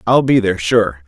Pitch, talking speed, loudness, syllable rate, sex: 105 Hz, 225 wpm, -14 LUFS, 5.4 syllables/s, male